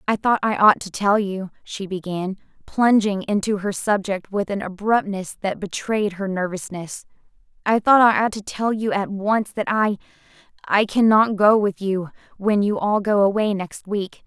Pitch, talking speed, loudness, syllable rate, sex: 200 Hz, 175 wpm, -20 LUFS, 4.5 syllables/s, female